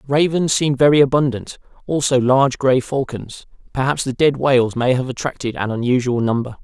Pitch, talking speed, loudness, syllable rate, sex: 130 Hz, 165 wpm, -17 LUFS, 5.4 syllables/s, male